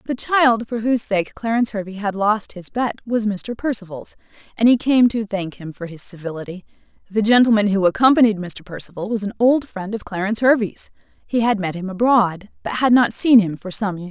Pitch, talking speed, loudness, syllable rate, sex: 210 Hz, 205 wpm, -19 LUFS, 5.5 syllables/s, female